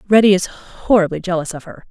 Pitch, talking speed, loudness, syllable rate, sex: 185 Hz, 190 wpm, -16 LUFS, 5.8 syllables/s, female